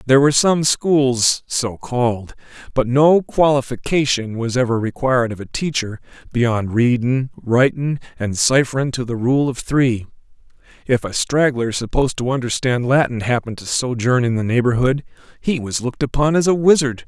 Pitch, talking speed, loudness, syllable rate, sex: 125 Hz, 155 wpm, -18 LUFS, 4.9 syllables/s, male